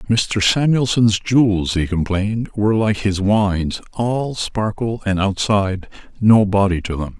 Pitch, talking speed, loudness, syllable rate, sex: 105 Hz, 135 wpm, -18 LUFS, 4.3 syllables/s, male